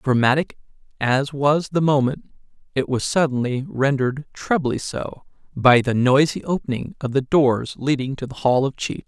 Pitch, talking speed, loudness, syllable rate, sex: 135 Hz, 160 wpm, -20 LUFS, 4.7 syllables/s, male